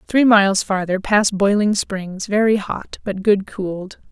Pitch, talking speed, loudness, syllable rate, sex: 200 Hz, 160 wpm, -18 LUFS, 4.2 syllables/s, female